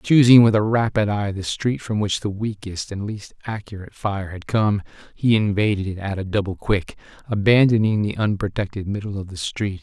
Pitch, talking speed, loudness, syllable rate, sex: 105 Hz, 190 wpm, -21 LUFS, 5.2 syllables/s, male